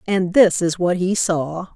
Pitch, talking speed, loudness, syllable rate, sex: 180 Hz, 205 wpm, -18 LUFS, 3.8 syllables/s, female